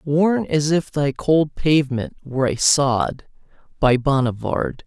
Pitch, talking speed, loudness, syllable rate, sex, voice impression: 145 Hz, 135 wpm, -19 LUFS, 3.7 syllables/s, male, masculine, adult-like, clear, slightly refreshing, sincere, friendly, slightly unique